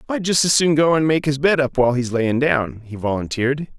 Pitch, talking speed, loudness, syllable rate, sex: 140 Hz, 255 wpm, -18 LUFS, 5.7 syllables/s, male